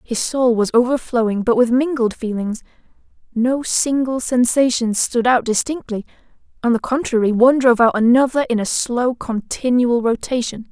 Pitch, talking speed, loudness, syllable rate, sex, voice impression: 240 Hz, 145 wpm, -17 LUFS, 5.0 syllables/s, female, very feminine, slightly young, slightly adult-like, very thin, slightly tensed, slightly powerful, bright, very hard, very clear, fluent, cute, very intellectual, very refreshing, sincere, calm, friendly, very reassuring, unique, slightly elegant, slightly wild, very sweet, lively, slightly kind, slightly intense, slightly sharp, light